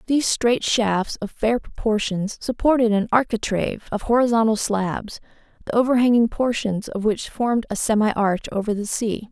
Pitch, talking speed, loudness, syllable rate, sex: 220 Hz, 155 wpm, -21 LUFS, 5.1 syllables/s, female